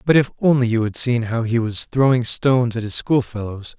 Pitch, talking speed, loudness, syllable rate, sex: 120 Hz, 240 wpm, -19 LUFS, 5.3 syllables/s, male